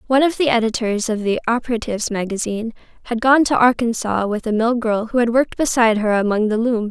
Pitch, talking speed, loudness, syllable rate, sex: 230 Hz, 210 wpm, -18 LUFS, 6.3 syllables/s, female